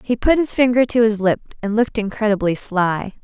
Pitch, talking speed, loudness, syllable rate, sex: 220 Hz, 205 wpm, -18 LUFS, 5.6 syllables/s, female